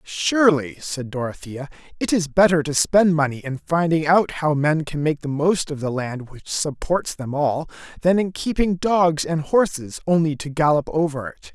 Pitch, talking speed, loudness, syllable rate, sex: 155 Hz, 185 wpm, -21 LUFS, 4.6 syllables/s, male